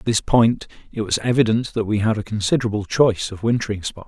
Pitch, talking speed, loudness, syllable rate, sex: 110 Hz, 220 wpm, -20 LUFS, 6.2 syllables/s, male